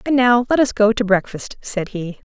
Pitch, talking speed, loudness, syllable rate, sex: 220 Hz, 235 wpm, -17 LUFS, 4.8 syllables/s, female